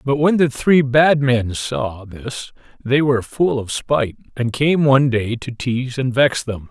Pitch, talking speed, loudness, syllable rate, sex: 125 Hz, 195 wpm, -18 LUFS, 4.3 syllables/s, male